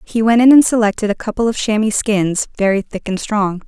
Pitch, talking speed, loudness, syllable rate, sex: 215 Hz, 230 wpm, -15 LUFS, 5.5 syllables/s, female